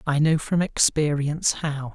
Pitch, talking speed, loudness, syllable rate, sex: 150 Hz, 155 wpm, -22 LUFS, 4.4 syllables/s, male